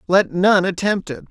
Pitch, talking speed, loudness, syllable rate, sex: 190 Hz, 185 wpm, -18 LUFS, 4.5 syllables/s, male